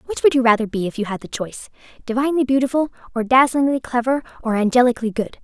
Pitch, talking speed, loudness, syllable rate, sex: 245 Hz, 190 wpm, -19 LUFS, 7.1 syllables/s, female